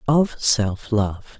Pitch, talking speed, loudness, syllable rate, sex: 115 Hz, 130 wpm, -21 LUFS, 2.5 syllables/s, male